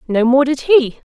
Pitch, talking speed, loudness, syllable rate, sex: 270 Hz, 215 wpm, -14 LUFS, 4.5 syllables/s, female